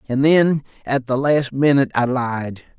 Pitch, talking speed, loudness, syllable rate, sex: 130 Hz, 170 wpm, -18 LUFS, 4.4 syllables/s, male